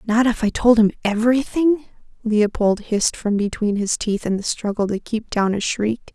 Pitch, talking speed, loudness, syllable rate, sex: 220 Hz, 195 wpm, -20 LUFS, 4.9 syllables/s, female